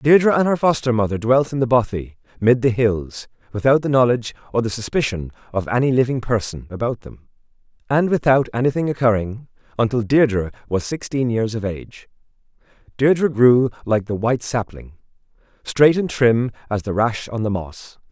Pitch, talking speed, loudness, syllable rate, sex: 120 Hz, 165 wpm, -19 LUFS, 5.3 syllables/s, male